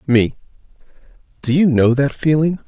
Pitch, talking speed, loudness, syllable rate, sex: 140 Hz, 135 wpm, -16 LUFS, 4.8 syllables/s, male